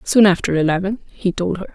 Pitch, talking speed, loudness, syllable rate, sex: 190 Hz, 205 wpm, -18 LUFS, 5.8 syllables/s, female